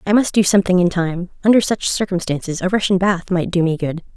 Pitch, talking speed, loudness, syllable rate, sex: 185 Hz, 230 wpm, -17 LUFS, 6.1 syllables/s, female